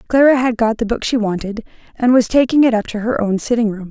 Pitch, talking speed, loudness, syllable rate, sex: 230 Hz, 260 wpm, -16 LUFS, 6.1 syllables/s, female